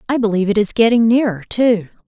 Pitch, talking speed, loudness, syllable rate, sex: 215 Hz, 205 wpm, -15 LUFS, 6.6 syllables/s, female